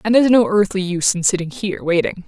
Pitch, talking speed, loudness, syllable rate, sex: 195 Hz, 240 wpm, -17 LUFS, 6.9 syllables/s, female